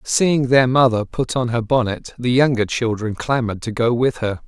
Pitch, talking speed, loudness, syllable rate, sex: 120 Hz, 200 wpm, -18 LUFS, 4.9 syllables/s, male